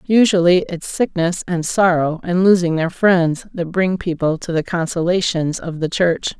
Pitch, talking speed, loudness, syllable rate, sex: 175 Hz, 170 wpm, -17 LUFS, 4.4 syllables/s, female